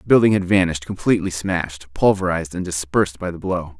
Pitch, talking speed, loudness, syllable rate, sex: 90 Hz, 190 wpm, -20 LUFS, 6.6 syllables/s, male